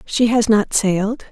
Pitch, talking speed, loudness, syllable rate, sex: 215 Hz, 185 wpm, -16 LUFS, 4.3 syllables/s, female